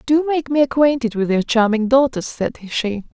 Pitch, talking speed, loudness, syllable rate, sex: 250 Hz, 190 wpm, -18 LUFS, 5.0 syllables/s, female